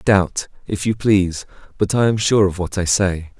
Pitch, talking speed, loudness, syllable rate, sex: 95 Hz, 210 wpm, -18 LUFS, 4.6 syllables/s, male